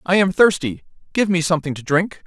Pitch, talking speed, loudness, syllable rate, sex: 175 Hz, 210 wpm, -18 LUFS, 6.0 syllables/s, male